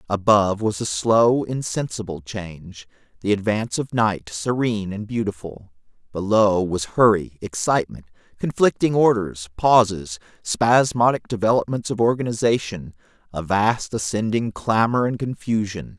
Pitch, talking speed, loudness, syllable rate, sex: 105 Hz, 115 wpm, -21 LUFS, 4.6 syllables/s, male